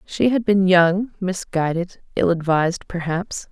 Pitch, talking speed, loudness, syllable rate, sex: 185 Hz, 135 wpm, -20 LUFS, 4.1 syllables/s, female